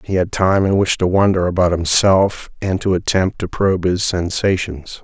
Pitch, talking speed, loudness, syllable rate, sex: 90 Hz, 190 wpm, -17 LUFS, 4.8 syllables/s, male